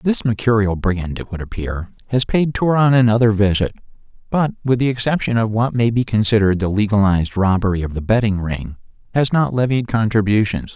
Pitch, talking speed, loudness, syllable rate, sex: 110 Hz, 175 wpm, -18 LUFS, 5.8 syllables/s, male